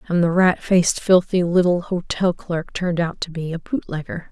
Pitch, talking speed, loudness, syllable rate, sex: 175 Hz, 195 wpm, -20 LUFS, 5.1 syllables/s, female